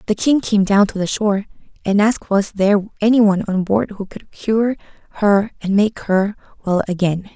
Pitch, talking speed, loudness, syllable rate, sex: 205 Hz, 190 wpm, -17 LUFS, 5.2 syllables/s, female